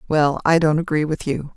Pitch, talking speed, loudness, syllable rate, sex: 155 Hz, 230 wpm, -19 LUFS, 5.3 syllables/s, female